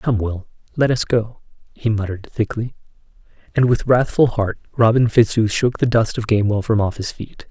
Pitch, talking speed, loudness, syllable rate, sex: 115 Hz, 185 wpm, -18 LUFS, 5.2 syllables/s, male